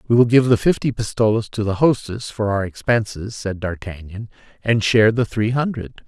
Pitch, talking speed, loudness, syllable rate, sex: 110 Hz, 190 wpm, -19 LUFS, 5.3 syllables/s, male